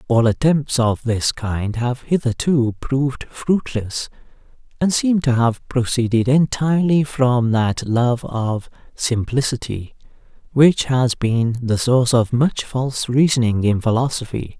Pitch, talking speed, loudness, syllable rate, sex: 125 Hz, 125 wpm, -19 LUFS, 4.0 syllables/s, male